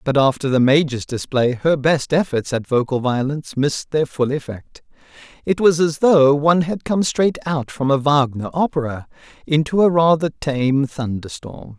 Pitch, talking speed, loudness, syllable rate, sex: 145 Hz, 170 wpm, -18 LUFS, 4.7 syllables/s, male